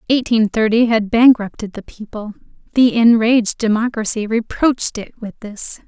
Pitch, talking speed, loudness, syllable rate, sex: 225 Hz, 135 wpm, -15 LUFS, 4.8 syllables/s, female